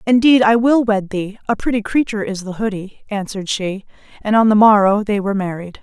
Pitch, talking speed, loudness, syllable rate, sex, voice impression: 210 Hz, 205 wpm, -16 LUFS, 5.8 syllables/s, female, feminine, adult-like, bright, clear, fluent, intellectual, slightly friendly, elegant, slightly strict, slightly sharp